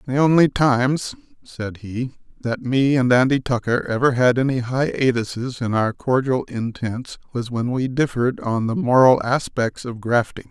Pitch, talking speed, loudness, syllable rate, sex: 125 Hz, 160 wpm, -20 LUFS, 4.5 syllables/s, male